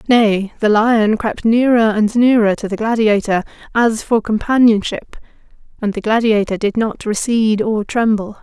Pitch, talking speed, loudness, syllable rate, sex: 220 Hz, 150 wpm, -15 LUFS, 4.6 syllables/s, female